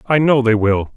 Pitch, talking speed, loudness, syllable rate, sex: 125 Hz, 250 wpm, -15 LUFS, 4.9 syllables/s, male